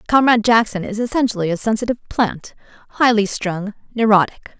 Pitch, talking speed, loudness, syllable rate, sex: 215 Hz, 130 wpm, -18 LUFS, 6.0 syllables/s, female